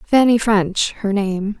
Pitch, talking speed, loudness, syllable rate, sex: 205 Hz, 150 wpm, -17 LUFS, 3.4 syllables/s, female